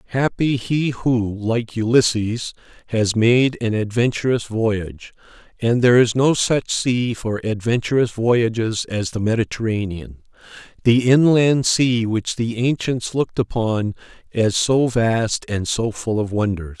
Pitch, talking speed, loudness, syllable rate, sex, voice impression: 115 Hz, 135 wpm, -19 LUFS, 4.1 syllables/s, male, masculine, middle-aged, thick, relaxed, powerful, slightly hard, slightly muffled, cool, intellectual, calm, mature, slightly friendly, reassuring, wild, lively, slightly strict